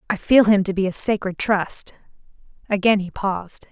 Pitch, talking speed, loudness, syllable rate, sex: 200 Hz, 180 wpm, -20 LUFS, 5.1 syllables/s, female